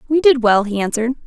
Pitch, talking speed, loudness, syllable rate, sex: 245 Hz, 235 wpm, -16 LUFS, 6.9 syllables/s, female